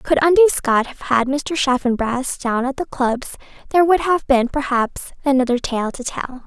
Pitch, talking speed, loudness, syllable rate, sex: 270 Hz, 185 wpm, -18 LUFS, 4.6 syllables/s, female